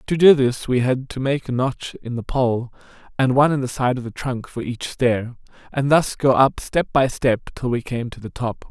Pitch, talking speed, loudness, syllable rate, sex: 125 Hz, 250 wpm, -20 LUFS, 5.0 syllables/s, male